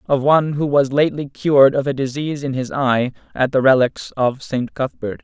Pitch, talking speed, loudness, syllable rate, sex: 135 Hz, 205 wpm, -18 LUFS, 5.4 syllables/s, male